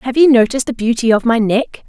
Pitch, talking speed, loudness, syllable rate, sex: 240 Hz, 255 wpm, -14 LUFS, 6.0 syllables/s, female